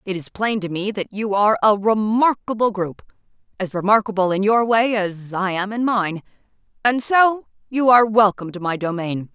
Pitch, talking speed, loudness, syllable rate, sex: 205 Hz, 175 wpm, -19 LUFS, 5.0 syllables/s, female